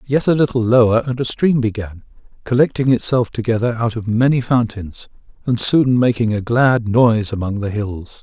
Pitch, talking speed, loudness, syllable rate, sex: 115 Hz, 175 wpm, -17 LUFS, 5.1 syllables/s, male